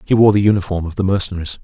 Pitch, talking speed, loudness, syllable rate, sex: 95 Hz, 255 wpm, -16 LUFS, 7.8 syllables/s, male